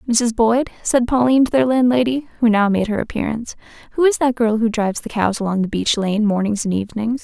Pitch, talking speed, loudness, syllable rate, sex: 225 Hz, 225 wpm, -18 LUFS, 6.1 syllables/s, female